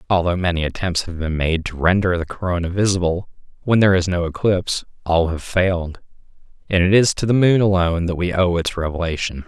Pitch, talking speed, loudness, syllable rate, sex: 90 Hz, 195 wpm, -19 LUFS, 6.0 syllables/s, male